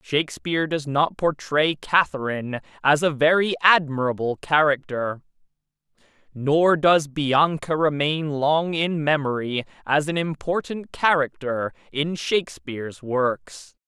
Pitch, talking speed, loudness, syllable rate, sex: 150 Hz, 105 wpm, -22 LUFS, 4.1 syllables/s, male